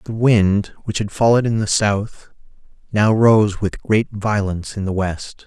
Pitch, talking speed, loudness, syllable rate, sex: 105 Hz, 175 wpm, -18 LUFS, 4.1 syllables/s, male